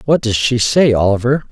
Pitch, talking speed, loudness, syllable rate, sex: 125 Hz, 200 wpm, -14 LUFS, 5.2 syllables/s, male